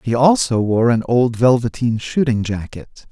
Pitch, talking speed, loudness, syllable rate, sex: 120 Hz, 155 wpm, -17 LUFS, 4.3 syllables/s, male